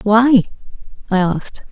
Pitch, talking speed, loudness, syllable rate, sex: 210 Hz, 105 wpm, -15 LUFS, 4.4 syllables/s, female